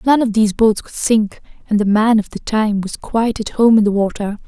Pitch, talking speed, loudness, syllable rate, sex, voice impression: 215 Hz, 255 wpm, -16 LUFS, 5.5 syllables/s, female, very feminine, very young, very thin, slightly relaxed, weak, dark, very soft, very clear, fluent, slightly raspy, very cute, very intellectual, refreshing, very sincere, very calm, very friendly, very reassuring, very unique, very elegant, slightly wild, very sweet, lively, very kind, slightly intense, slightly sharp, slightly modest, very light